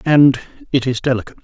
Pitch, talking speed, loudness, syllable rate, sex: 130 Hz, 170 wpm, -16 LUFS, 5.7 syllables/s, male